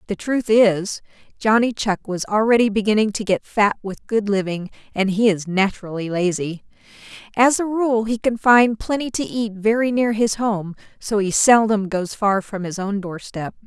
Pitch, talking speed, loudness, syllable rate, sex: 210 Hz, 180 wpm, -19 LUFS, 4.7 syllables/s, female